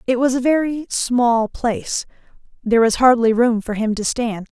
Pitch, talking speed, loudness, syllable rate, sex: 240 Hz, 185 wpm, -18 LUFS, 4.8 syllables/s, female